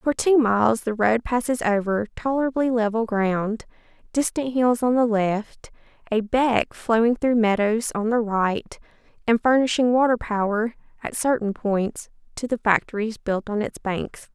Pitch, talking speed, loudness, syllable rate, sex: 225 Hz, 155 wpm, -22 LUFS, 4.4 syllables/s, female